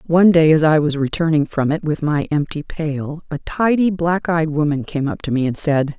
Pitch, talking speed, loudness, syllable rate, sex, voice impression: 155 Hz, 230 wpm, -18 LUFS, 5.0 syllables/s, female, very feminine, very adult-like, slightly middle-aged, calm, elegant